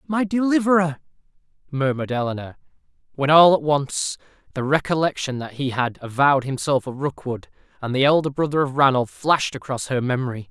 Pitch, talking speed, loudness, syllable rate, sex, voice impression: 145 Hz, 155 wpm, -21 LUFS, 5.7 syllables/s, male, masculine, very adult-like, middle-aged, very thick, tensed, powerful, bright, hard, very clear, fluent, cool, intellectual, sincere, calm, very mature, slightly friendly, reassuring, wild, slightly lively, slightly strict